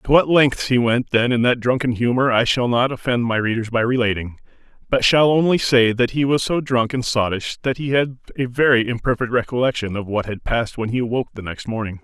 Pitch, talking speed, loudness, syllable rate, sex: 120 Hz, 230 wpm, -19 LUFS, 5.6 syllables/s, male